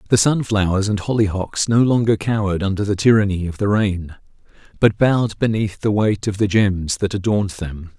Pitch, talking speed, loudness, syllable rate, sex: 100 Hz, 180 wpm, -18 LUFS, 5.4 syllables/s, male